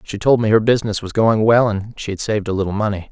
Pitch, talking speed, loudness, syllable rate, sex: 105 Hz, 290 wpm, -17 LUFS, 6.6 syllables/s, male